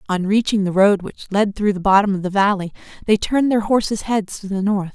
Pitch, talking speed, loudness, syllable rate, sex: 200 Hz, 245 wpm, -18 LUFS, 5.9 syllables/s, female